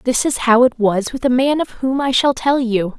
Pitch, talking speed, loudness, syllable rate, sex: 250 Hz, 280 wpm, -16 LUFS, 4.8 syllables/s, female